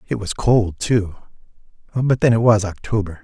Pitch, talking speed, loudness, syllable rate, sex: 105 Hz, 165 wpm, -18 LUFS, 4.8 syllables/s, male